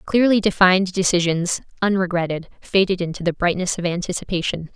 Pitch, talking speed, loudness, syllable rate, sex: 180 Hz, 125 wpm, -20 LUFS, 5.8 syllables/s, female